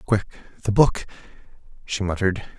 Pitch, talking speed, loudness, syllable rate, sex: 100 Hz, 95 wpm, -23 LUFS, 5.8 syllables/s, male